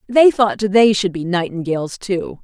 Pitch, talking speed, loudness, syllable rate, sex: 195 Hz, 170 wpm, -16 LUFS, 4.5 syllables/s, female